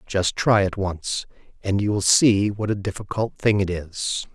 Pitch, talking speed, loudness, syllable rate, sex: 100 Hz, 195 wpm, -22 LUFS, 4.2 syllables/s, male